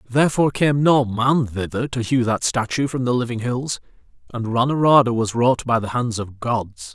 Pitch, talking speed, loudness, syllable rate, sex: 120 Hz, 190 wpm, -20 LUFS, 5.0 syllables/s, male